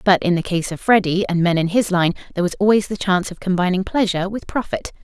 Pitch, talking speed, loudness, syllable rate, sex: 185 Hz, 250 wpm, -19 LUFS, 6.6 syllables/s, female